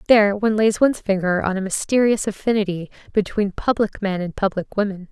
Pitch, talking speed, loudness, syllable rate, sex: 205 Hz, 175 wpm, -20 LUFS, 5.9 syllables/s, female